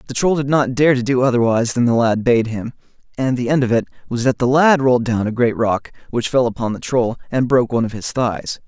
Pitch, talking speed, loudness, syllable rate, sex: 125 Hz, 265 wpm, -17 LUFS, 6.0 syllables/s, male